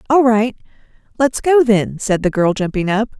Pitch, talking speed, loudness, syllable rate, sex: 225 Hz, 190 wpm, -16 LUFS, 4.6 syllables/s, female